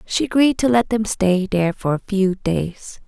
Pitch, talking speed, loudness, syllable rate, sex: 205 Hz, 215 wpm, -19 LUFS, 4.5 syllables/s, female